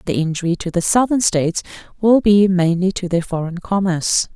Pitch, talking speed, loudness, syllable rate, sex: 185 Hz, 180 wpm, -17 LUFS, 5.6 syllables/s, female